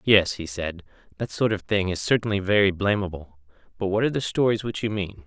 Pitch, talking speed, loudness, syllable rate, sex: 100 Hz, 215 wpm, -24 LUFS, 5.9 syllables/s, male